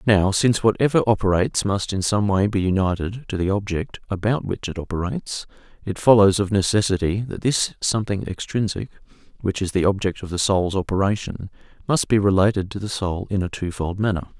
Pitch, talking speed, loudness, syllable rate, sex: 100 Hz, 180 wpm, -21 LUFS, 5.7 syllables/s, male